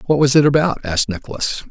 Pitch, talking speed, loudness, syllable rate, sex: 135 Hz, 210 wpm, -17 LUFS, 6.5 syllables/s, male